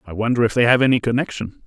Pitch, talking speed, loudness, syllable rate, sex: 120 Hz, 250 wpm, -18 LUFS, 7.2 syllables/s, male